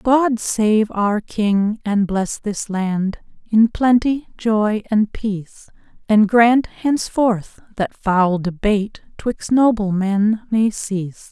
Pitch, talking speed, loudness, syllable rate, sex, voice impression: 215 Hz, 120 wpm, -18 LUFS, 3.3 syllables/s, female, very feminine, very adult-like, very middle-aged, very thin, slightly relaxed, slightly weak, slightly dark, very soft, clear, slightly fluent, very cute, very intellectual, refreshing, very sincere, very calm, very friendly, very reassuring, unique, very elegant, very sweet, slightly lively, very kind, slightly sharp, very modest, light